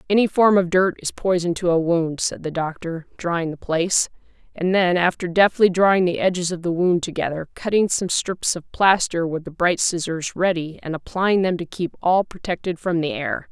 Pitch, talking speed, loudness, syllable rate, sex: 175 Hz, 205 wpm, -21 LUFS, 5.0 syllables/s, female